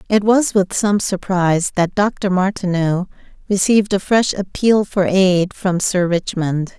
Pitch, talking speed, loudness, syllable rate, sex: 190 Hz, 150 wpm, -17 LUFS, 4.1 syllables/s, female